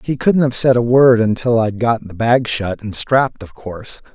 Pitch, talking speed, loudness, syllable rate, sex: 120 Hz, 230 wpm, -15 LUFS, 4.8 syllables/s, male